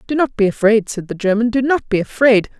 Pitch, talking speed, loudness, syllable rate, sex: 225 Hz, 255 wpm, -16 LUFS, 5.9 syllables/s, female